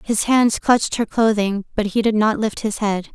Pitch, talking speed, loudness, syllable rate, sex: 215 Hz, 230 wpm, -19 LUFS, 4.8 syllables/s, female